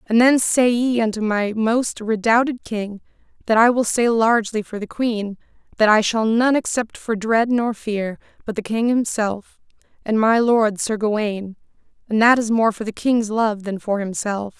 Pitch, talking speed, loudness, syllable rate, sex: 220 Hz, 190 wpm, -19 LUFS, 4.5 syllables/s, female